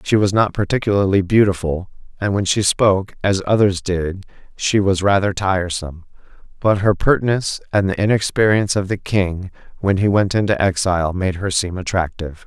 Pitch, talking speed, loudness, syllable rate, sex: 95 Hz, 165 wpm, -18 LUFS, 5.3 syllables/s, male